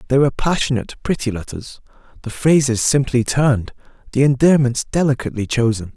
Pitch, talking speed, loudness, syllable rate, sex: 130 Hz, 120 wpm, -17 LUFS, 6.0 syllables/s, male